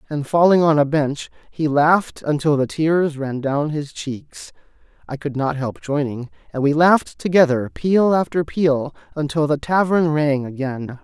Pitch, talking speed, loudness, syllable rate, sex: 150 Hz, 170 wpm, -19 LUFS, 4.4 syllables/s, male